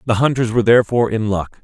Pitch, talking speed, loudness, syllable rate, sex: 115 Hz, 220 wpm, -16 LUFS, 7.5 syllables/s, male